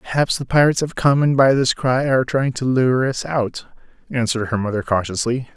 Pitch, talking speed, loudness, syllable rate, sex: 125 Hz, 205 wpm, -18 LUFS, 5.7 syllables/s, male